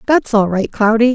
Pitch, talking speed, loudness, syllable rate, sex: 225 Hz, 210 wpm, -14 LUFS, 4.8 syllables/s, female